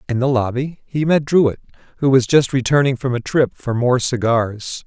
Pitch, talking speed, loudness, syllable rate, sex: 130 Hz, 195 wpm, -17 LUFS, 4.7 syllables/s, male